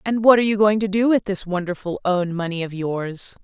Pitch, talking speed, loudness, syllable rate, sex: 195 Hz, 245 wpm, -20 LUFS, 5.5 syllables/s, female